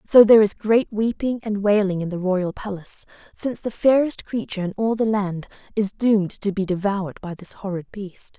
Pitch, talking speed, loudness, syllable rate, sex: 205 Hz, 200 wpm, -21 LUFS, 5.5 syllables/s, female